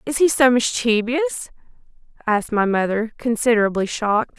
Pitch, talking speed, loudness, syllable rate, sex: 225 Hz, 125 wpm, -19 LUFS, 5.3 syllables/s, female